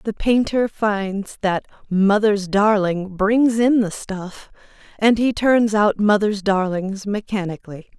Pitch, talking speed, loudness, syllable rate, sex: 205 Hz, 130 wpm, -19 LUFS, 3.7 syllables/s, female